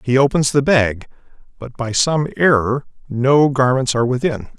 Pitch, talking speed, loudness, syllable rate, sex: 130 Hz, 155 wpm, -16 LUFS, 4.7 syllables/s, male